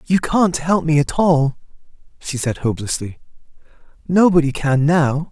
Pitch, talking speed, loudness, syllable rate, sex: 150 Hz, 135 wpm, -17 LUFS, 4.6 syllables/s, male